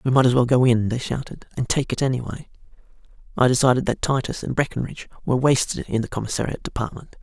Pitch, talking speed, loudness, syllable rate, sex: 125 Hz, 200 wpm, -22 LUFS, 6.7 syllables/s, male